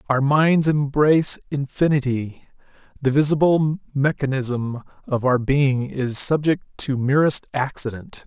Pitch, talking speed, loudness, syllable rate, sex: 140 Hz, 110 wpm, -20 LUFS, 4.0 syllables/s, male